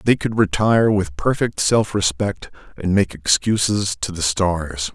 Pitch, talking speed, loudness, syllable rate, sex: 95 Hz, 160 wpm, -19 LUFS, 4.2 syllables/s, male